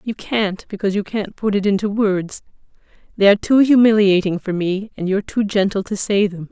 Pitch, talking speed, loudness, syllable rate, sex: 200 Hz, 195 wpm, -18 LUFS, 5.5 syllables/s, female